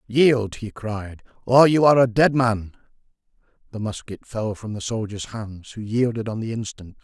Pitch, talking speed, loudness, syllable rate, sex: 115 Hz, 180 wpm, -21 LUFS, 4.6 syllables/s, male